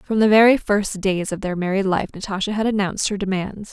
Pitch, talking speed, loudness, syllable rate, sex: 200 Hz, 225 wpm, -20 LUFS, 5.9 syllables/s, female